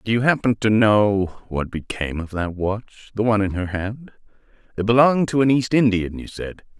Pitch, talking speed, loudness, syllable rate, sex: 105 Hz, 195 wpm, -20 LUFS, 5.2 syllables/s, male